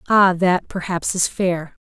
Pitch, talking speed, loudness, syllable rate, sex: 180 Hz, 165 wpm, -19 LUFS, 3.7 syllables/s, female